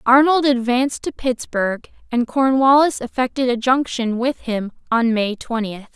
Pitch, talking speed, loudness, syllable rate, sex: 245 Hz, 140 wpm, -19 LUFS, 4.7 syllables/s, female